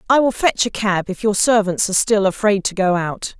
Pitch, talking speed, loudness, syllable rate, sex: 205 Hz, 250 wpm, -17 LUFS, 5.3 syllables/s, female